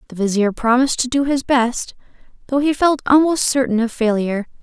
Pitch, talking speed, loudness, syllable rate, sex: 250 Hz, 180 wpm, -17 LUFS, 5.7 syllables/s, female